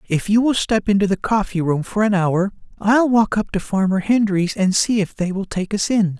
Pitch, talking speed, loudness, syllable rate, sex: 200 Hz, 240 wpm, -18 LUFS, 5.0 syllables/s, male